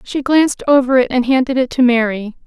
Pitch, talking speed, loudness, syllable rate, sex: 255 Hz, 220 wpm, -14 LUFS, 5.8 syllables/s, female